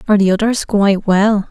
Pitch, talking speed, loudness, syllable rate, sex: 205 Hz, 200 wpm, -14 LUFS, 5.9 syllables/s, female